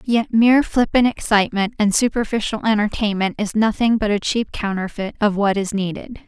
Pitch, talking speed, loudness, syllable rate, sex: 215 Hz, 165 wpm, -19 LUFS, 5.4 syllables/s, female